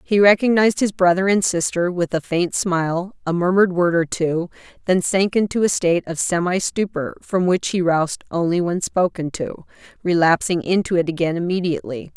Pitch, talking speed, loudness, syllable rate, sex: 175 Hz, 180 wpm, -19 LUFS, 5.3 syllables/s, female